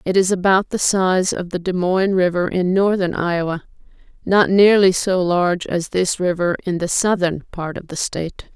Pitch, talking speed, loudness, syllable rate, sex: 180 Hz, 190 wpm, -18 LUFS, 4.9 syllables/s, female